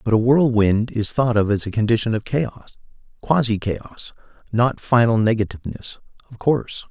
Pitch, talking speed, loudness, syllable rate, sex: 115 Hz, 150 wpm, -20 LUFS, 4.9 syllables/s, male